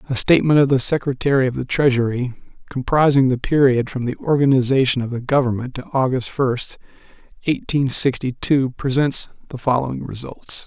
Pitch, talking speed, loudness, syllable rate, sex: 130 Hz, 150 wpm, -19 LUFS, 5.3 syllables/s, male